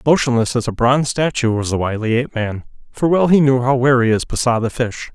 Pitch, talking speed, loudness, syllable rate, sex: 125 Hz, 235 wpm, -17 LUFS, 5.7 syllables/s, male